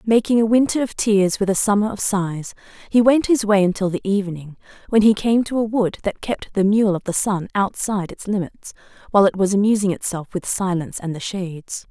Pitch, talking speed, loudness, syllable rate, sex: 200 Hz, 215 wpm, -19 LUFS, 5.6 syllables/s, female